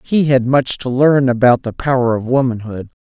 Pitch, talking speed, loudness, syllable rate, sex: 130 Hz, 200 wpm, -15 LUFS, 5.0 syllables/s, male